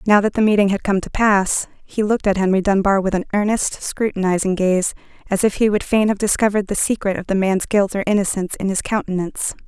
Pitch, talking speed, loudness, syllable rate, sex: 200 Hz, 225 wpm, -18 LUFS, 6.1 syllables/s, female